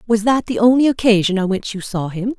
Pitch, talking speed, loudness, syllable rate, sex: 220 Hz, 250 wpm, -16 LUFS, 5.9 syllables/s, female